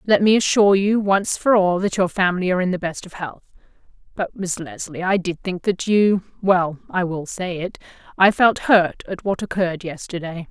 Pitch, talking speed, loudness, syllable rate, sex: 185 Hz, 200 wpm, -20 LUFS, 5.1 syllables/s, female